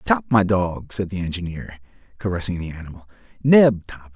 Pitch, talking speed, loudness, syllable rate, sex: 90 Hz, 160 wpm, -21 LUFS, 5.5 syllables/s, male